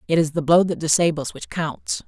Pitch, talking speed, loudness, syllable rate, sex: 160 Hz, 230 wpm, -21 LUFS, 5.3 syllables/s, female